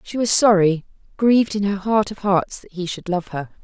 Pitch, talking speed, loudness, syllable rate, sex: 195 Hz, 230 wpm, -19 LUFS, 5.1 syllables/s, female